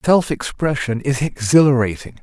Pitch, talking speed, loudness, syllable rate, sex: 135 Hz, 110 wpm, -17 LUFS, 4.8 syllables/s, male